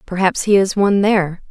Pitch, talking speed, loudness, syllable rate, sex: 190 Hz, 200 wpm, -15 LUFS, 5.2 syllables/s, female